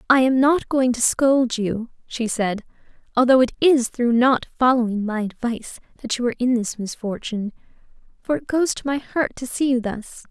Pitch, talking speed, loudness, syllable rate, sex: 245 Hz, 190 wpm, -21 LUFS, 5.1 syllables/s, female